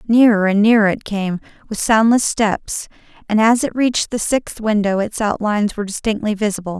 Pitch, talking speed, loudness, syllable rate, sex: 215 Hz, 175 wpm, -17 LUFS, 5.3 syllables/s, female